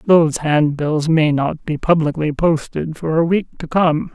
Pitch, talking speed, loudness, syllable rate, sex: 160 Hz, 175 wpm, -17 LUFS, 4.3 syllables/s, female